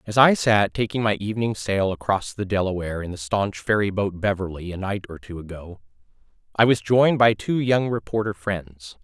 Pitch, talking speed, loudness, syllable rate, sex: 100 Hz, 195 wpm, -22 LUFS, 5.2 syllables/s, male